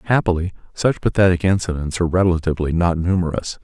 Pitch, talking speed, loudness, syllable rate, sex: 90 Hz, 130 wpm, -19 LUFS, 6.5 syllables/s, male